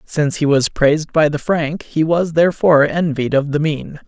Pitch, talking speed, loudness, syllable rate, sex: 155 Hz, 205 wpm, -16 LUFS, 5.1 syllables/s, male